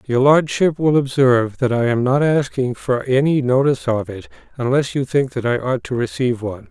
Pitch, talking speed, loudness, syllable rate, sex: 130 Hz, 205 wpm, -18 LUFS, 5.4 syllables/s, male